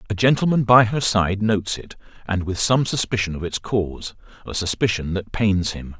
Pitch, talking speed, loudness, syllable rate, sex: 100 Hz, 180 wpm, -20 LUFS, 5.2 syllables/s, male